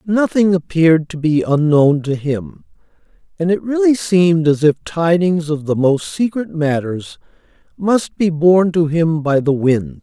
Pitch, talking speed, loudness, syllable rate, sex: 165 Hz, 160 wpm, -15 LUFS, 4.3 syllables/s, male